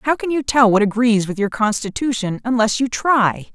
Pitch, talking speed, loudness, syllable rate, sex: 235 Hz, 205 wpm, -17 LUFS, 5.0 syllables/s, female